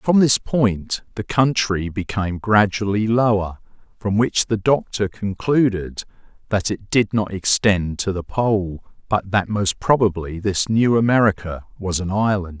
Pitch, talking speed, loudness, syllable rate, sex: 105 Hz, 150 wpm, -20 LUFS, 4.2 syllables/s, male